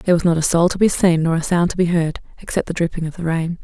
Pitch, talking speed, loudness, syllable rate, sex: 170 Hz, 330 wpm, -18 LUFS, 6.8 syllables/s, female